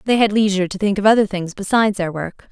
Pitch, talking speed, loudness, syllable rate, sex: 200 Hz, 265 wpm, -17 LUFS, 6.8 syllables/s, female